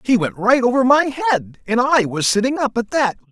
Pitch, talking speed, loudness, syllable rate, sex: 235 Hz, 235 wpm, -17 LUFS, 5.1 syllables/s, male